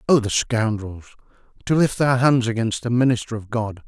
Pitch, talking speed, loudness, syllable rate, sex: 120 Hz, 185 wpm, -20 LUFS, 5.2 syllables/s, male